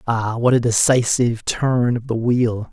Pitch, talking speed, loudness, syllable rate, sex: 120 Hz, 175 wpm, -18 LUFS, 4.3 syllables/s, male